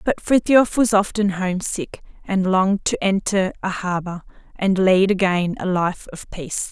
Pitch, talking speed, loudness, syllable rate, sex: 190 Hz, 160 wpm, -19 LUFS, 4.6 syllables/s, female